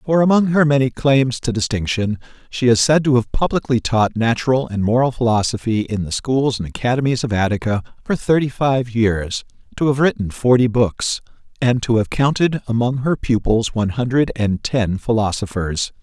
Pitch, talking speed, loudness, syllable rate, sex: 120 Hz, 170 wpm, -18 LUFS, 5.1 syllables/s, male